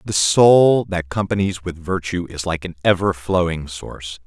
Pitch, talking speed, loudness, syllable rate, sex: 90 Hz, 170 wpm, -18 LUFS, 4.5 syllables/s, male